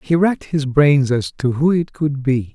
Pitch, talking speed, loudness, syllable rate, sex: 140 Hz, 235 wpm, -17 LUFS, 4.5 syllables/s, male